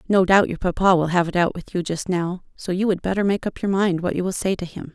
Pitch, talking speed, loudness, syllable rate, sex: 185 Hz, 315 wpm, -21 LUFS, 6.1 syllables/s, female